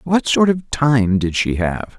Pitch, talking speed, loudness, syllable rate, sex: 125 Hz, 210 wpm, -17 LUFS, 3.6 syllables/s, male